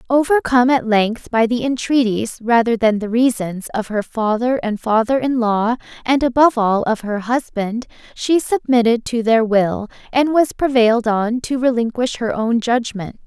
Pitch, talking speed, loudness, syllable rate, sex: 235 Hz, 165 wpm, -17 LUFS, 4.6 syllables/s, female